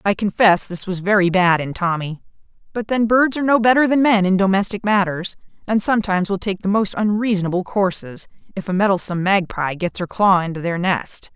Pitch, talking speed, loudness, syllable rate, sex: 195 Hz, 195 wpm, -18 LUFS, 5.7 syllables/s, female